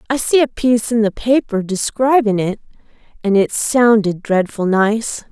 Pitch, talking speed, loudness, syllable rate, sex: 225 Hz, 160 wpm, -16 LUFS, 4.5 syllables/s, female